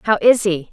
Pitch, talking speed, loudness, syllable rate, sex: 200 Hz, 250 wpm, -15 LUFS, 4.8 syllables/s, female